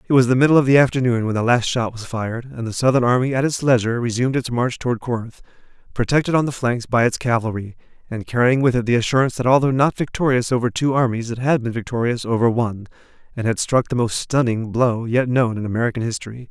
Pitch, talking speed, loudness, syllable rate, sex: 120 Hz, 230 wpm, -19 LUFS, 6.6 syllables/s, male